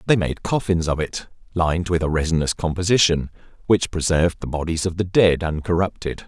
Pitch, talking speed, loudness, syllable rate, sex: 85 Hz, 170 wpm, -21 LUFS, 5.7 syllables/s, male